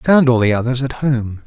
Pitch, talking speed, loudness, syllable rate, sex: 125 Hz, 285 wpm, -16 LUFS, 5.9 syllables/s, male